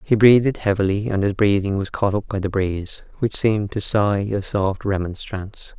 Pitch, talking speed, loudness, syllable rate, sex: 100 Hz, 195 wpm, -20 LUFS, 5.1 syllables/s, male